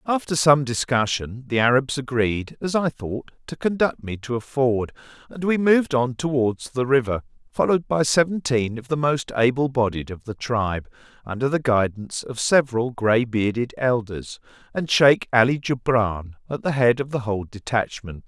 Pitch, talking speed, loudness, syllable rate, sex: 125 Hz, 170 wpm, -22 LUFS, 4.9 syllables/s, male